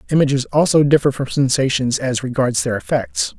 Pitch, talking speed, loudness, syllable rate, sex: 135 Hz, 160 wpm, -17 LUFS, 5.4 syllables/s, male